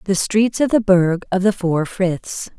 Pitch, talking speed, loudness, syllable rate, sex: 190 Hz, 210 wpm, -18 LUFS, 3.9 syllables/s, female